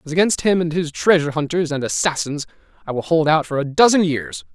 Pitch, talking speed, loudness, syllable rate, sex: 155 Hz, 225 wpm, -18 LUFS, 6.1 syllables/s, male